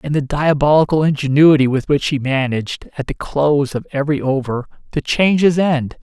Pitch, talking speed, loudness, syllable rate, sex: 140 Hz, 180 wpm, -16 LUFS, 5.5 syllables/s, male